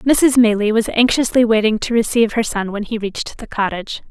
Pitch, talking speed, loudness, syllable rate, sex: 225 Hz, 205 wpm, -16 LUFS, 5.7 syllables/s, female